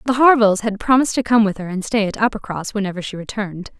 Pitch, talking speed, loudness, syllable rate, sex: 210 Hz, 235 wpm, -18 LUFS, 6.9 syllables/s, female